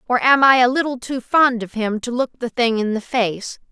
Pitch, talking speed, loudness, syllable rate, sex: 245 Hz, 260 wpm, -18 LUFS, 4.8 syllables/s, female